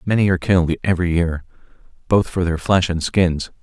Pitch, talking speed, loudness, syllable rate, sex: 85 Hz, 180 wpm, -18 LUFS, 5.9 syllables/s, male